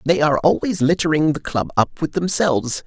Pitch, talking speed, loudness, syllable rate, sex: 155 Hz, 190 wpm, -19 LUFS, 5.7 syllables/s, male